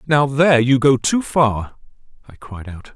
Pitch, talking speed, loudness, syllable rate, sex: 125 Hz, 185 wpm, -16 LUFS, 4.4 syllables/s, male